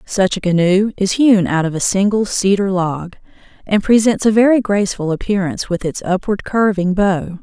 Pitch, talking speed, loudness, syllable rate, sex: 195 Hz, 180 wpm, -15 LUFS, 5.0 syllables/s, female